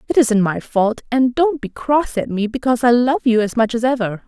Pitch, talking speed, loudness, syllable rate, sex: 240 Hz, 255 wpm, -17 LUFS, 5.3 syllables/s, female